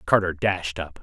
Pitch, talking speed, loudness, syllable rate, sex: 85 Hz, 175 wpm, -24 LUFS, 4.4 syllables/s, male